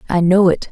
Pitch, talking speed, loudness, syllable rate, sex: 180 Hz, 250 wpm, -13 LUFS, 5.9 syllables/s, female